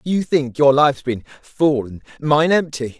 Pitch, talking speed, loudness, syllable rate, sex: 140 Hz, 180 wpm, -17 LUFS, 4.3 syllables/s, male